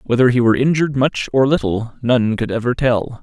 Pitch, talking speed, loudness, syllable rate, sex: 125 Hz, 205 wpm, -17 LUFS, 5.6 syllables/s, male